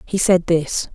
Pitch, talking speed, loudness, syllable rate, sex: 175 Hz, 190 wpm, -18 LUFS, 3.8 syllables/s, female